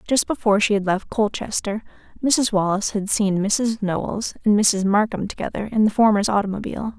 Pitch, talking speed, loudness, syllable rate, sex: 210 Hz, 170 wpm, -20 LUFS, 5.6 syllables/s, female